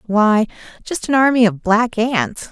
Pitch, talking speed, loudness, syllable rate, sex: 225 Hz, 165 wpm, -16 LUFS, 4.0 syllables/s, female